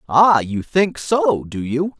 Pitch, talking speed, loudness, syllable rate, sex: 150 Hz, 180 wpm, -18 LUFS, 3.4 syllables/s, male